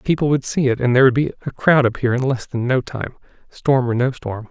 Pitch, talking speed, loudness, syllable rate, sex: 130 Hz, 265 wpm, -18 LUFS, 5.8 syllables/s, male